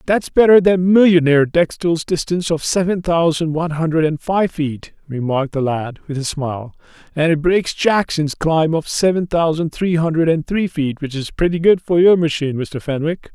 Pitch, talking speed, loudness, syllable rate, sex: 160 Hz, 190 wpm, -17 LUFS, 5.1 syllables/s, male